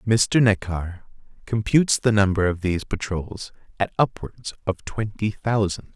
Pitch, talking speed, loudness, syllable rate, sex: 105 Hz, 130 wpm, -23 LUFS, 4.3 syllables/s, male